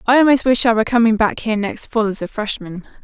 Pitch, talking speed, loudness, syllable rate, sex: 225 Hz, 255 wpm, -17 LUFS, 6.6 syllables/s, female